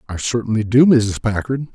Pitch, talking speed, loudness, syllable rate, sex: 115 Hz, 170 wpm, -17 LUFS, 5.2 syllables/s, male